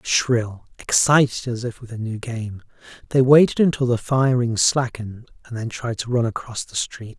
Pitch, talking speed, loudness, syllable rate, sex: 120 Hz, 185 wpm, -20 LUFS, 4.7 syllables/s, male